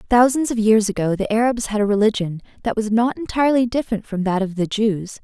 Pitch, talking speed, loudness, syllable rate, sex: 220 Hz, 220 wpm, -19 LUFS, 6.1 syllables/s, female